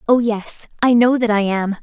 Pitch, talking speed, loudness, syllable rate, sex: 225 Hz, 230 wpm, -17 LUFS, 4.6 syllables/s, female